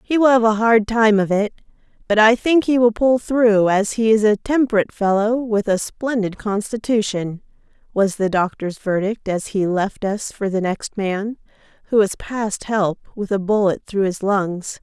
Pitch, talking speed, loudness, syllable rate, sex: 210 Hz, 190 wpm, -19 LUFS, 4.5 syllables/s, female